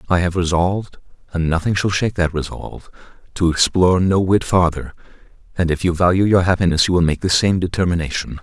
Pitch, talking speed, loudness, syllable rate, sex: 90 Hz, 185 wpm, -17 LUFS, 6.2 syllables/s, male